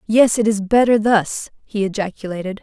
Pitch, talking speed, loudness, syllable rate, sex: 210 Hz, 160 wpm, -18 LUFS, 5.1 syllables/s, female